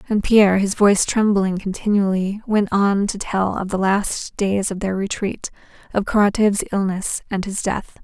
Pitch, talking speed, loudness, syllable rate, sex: 200 Hz, 170 wpm, -19 LUFS, 4.6 syllables/s, female